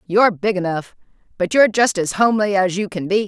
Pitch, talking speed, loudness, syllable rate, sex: 195 Hz, 220 wpm, -18 LUFS, 6.1 syllables/s, female